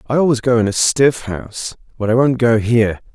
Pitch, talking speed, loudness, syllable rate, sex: 120 Hz, 230 wpm, -16 LUFS, 5.6 syllables/s, male